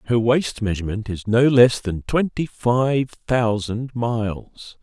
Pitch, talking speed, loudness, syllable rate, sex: 115 Hz, 135 wpm, -20 LUFS, 3.7 syllables/s, male